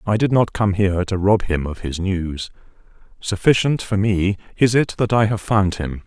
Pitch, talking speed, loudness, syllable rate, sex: 100 Hz, 210 wpm, -19 LUFS, 4.8 syllables/s, male